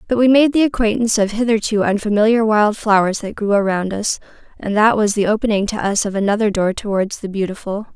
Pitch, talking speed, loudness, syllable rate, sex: 210 Hz, 205 wpm, -17 LUFS, 6.0 syllables/s, female